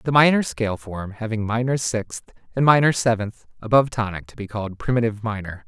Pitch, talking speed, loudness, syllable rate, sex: 115 Hz, 180 wpm, -22 LUFS, 6.0 syllables/s, male